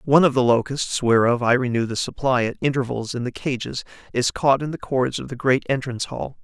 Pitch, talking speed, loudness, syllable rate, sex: 130 Hz, 225 wpm, -21 LUFS, 5.6 syllables/s, male